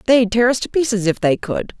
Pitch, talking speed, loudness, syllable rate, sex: 225 Hz, 265 wpm, -17 LUFS, 5.6 syllables/s, female